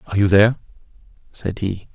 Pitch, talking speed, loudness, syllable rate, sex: 100 Hz, 155 wpm, -19 LUFS, 6.7 syllables/s, male